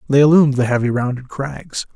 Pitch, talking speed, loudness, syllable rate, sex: 135 Hz, 185 wpm, -17 LUFS, 6.4 syllables/s, male